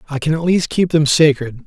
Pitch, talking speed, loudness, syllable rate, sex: 155 Hz, 255 wpm, -15 LUFS, 5.6 syllables/s, male